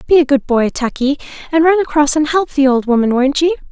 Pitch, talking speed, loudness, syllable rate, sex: 290 Hz, 245 wpm, -14 LUFS, 5.8 syllables/s, female